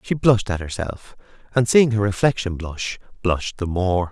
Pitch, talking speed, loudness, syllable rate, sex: 100 Hz, 175 wpm, -21 LUFS, 5.0 syllables/s, male